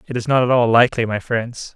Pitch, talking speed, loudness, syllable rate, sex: 120 Hz, 275 wpm, -17 LUFS, 6.4 syllables/s, male